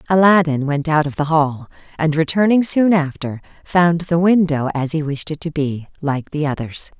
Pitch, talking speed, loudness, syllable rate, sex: 155 Hz, 190 wpm, -17 LUFS, 4.8 syllables/s, female